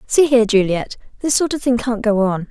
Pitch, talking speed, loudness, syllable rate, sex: 230 Hz, 240 wpm, -17 LUFS, 5.6 syllables/s, female